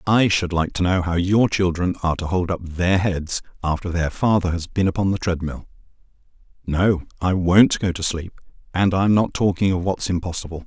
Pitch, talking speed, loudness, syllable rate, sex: 90 Hz, 190 wpm, -21 LUFS, 5.2 syllables/s, male